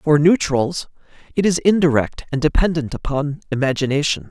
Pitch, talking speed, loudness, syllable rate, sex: 150 Hz, 125 wpm, -19 LUFS, 5.2 syllables/s, male